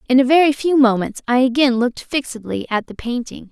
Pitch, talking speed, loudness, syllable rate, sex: 255 Hz, 205 wpm, -17 LUFS, 5.9 syllables/s, female